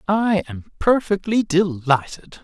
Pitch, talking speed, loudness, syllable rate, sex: 180 Hz, 100 wpm, -20 LUFS, 3.7 syllables/s, male